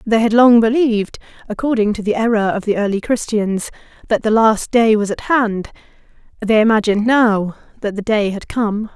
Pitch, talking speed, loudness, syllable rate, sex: 220 Hz, 180 wpm, -16 LUFS, 5.2 syllables/s, female